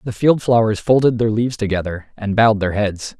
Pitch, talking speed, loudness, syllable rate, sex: 110 Hz, 205 wpm, -17 LUFS, 5.7 syllables/s, male